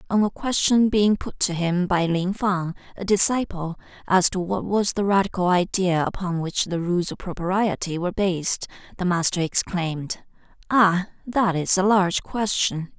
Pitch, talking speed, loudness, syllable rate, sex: 185 Hz, 165 wpm, -22 LUFS, 4.6 syllables/s, female